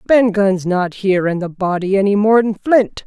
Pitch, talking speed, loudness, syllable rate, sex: 200 Hz, 195 wpm, -15 LUFS, 4.8 syllables/s, female